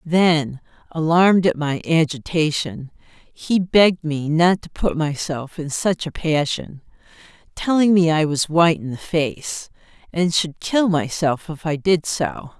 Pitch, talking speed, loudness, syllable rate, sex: 160 Hz, 150 wpm, -19 LUFS, 4.0 syllables/s, female